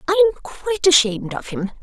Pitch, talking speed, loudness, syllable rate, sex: 260 Hz, 195 wpm, -18 LUFS, 6.9 syllables/s, female